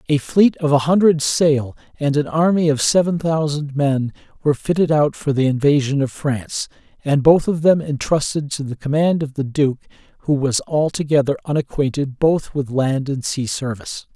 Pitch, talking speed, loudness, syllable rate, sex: 145 Hz, 180 wpm, -18 LUFS, 4.9 syllables/s, male